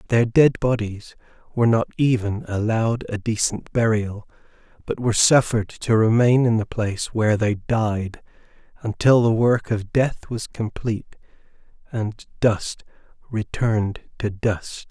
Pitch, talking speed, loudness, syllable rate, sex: 110 Hz, 135 wpm, -21 LUFS, 4.4 syllables/s, male